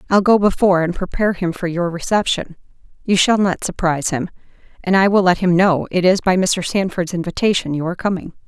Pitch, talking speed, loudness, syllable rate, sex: 185 Hz, 190 wpm, -17 LUFS, 6.0 syllables/s, female